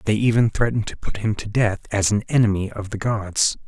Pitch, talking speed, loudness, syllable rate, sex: 105 Hz, 230 wpm, -21 LUFS, 5.7 syllables/s, male